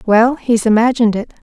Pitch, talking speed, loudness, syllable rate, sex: 230 Hz, 160 wpm, -14 LUFS, 5.7 syllables/s, female